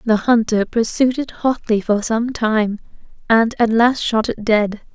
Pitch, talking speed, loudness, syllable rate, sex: 225 Hz, 170 wpm, -17 LUFS, 4.0 syllables/s, female